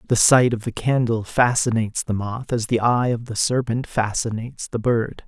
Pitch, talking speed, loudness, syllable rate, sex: 115 Hz, 195 wpm, -21 LUFS, 5.0 syllables/s, male